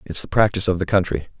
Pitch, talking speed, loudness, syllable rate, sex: 90 Hz, 255 wpm, -20 LUFS, 7.5 syllables/s, male